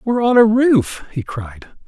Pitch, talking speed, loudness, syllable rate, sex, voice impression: 200 Hz, 190 wpm, -15 LUFS, 4.6 syllables/s, male, masculine, adult-like, tensed, powerful, hard, slightly muffled, fluent, slightly raspy, intellectual, calm, slightly wild, lively, slightly modest